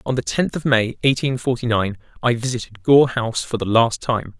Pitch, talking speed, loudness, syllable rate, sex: 120 Hz, 220 wpm, -19 LUFS, 5.3 syllables/s, male